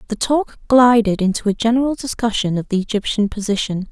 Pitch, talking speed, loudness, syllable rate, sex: 220 Hz, 170 wpm, -17 LUFS, 5.8 syllables/s, female